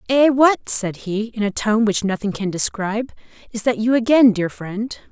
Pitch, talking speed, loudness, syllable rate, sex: 220 Hz, 200 wpm, -19 LUFS, 4.7 syllables/s, female